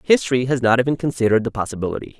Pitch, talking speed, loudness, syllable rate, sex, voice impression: 125 Hz, 190 wpm, -19 LUFS, 8.2 syllables/s, male, slightly masculine, adult-like, slightly refreshing, slightly friendly, slightly unique